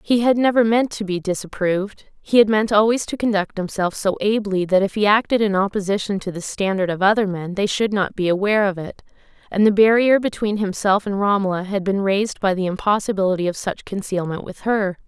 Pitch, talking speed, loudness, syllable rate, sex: 200 Hz, 210 wpm, -19 LUFS, 5.7 syllables/s, female